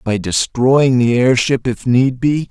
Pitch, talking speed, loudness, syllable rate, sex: 125 Hz, 170 wpm, -14 LUFS, 3.7 syllables/s, male